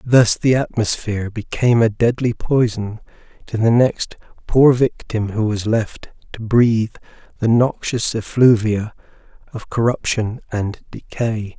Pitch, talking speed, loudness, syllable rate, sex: 115 Hz, 125 wpm, -18 LUFS, 4.2 syllables/s, male